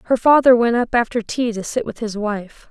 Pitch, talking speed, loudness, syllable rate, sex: 230 Hz, 245 wpm, -18 LUFS, 4.9 syllables/s, female